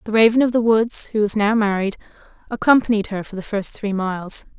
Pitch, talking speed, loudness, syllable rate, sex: 210 Hz, 210 wpm, -19 LUFS, 5.8 syllables/s, female